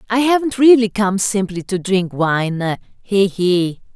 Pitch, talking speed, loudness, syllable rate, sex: 200 Hz, 150 wpm, -16 LUFS, 3.8 syllables/s, female